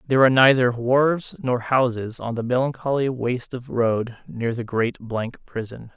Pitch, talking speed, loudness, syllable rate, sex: 125 Hz, 170 wpm, -22 LUFS, 4.7 syllables/s, male